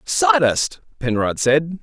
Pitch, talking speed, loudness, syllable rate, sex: 135 Hz, 100 wpm, -18 LUFS, 3.3 syllables/s, male